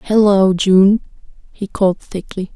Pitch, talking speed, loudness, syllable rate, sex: 195 Hz, 115 wpm, -14 LUFS, 4.0 syllables/s, female